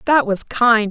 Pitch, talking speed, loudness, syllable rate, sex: 235 Hz, 200 wpm, -16 LUFS, 3.7 syllables/s, female